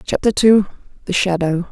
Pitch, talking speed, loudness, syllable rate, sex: 190 Hz, 140 wpm, -16 LUFS, 5.0 syllables/s, female